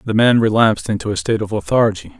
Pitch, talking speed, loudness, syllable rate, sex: 105 Hz, 220 wpm, -16 LUFS, 6.9 syllables/s, male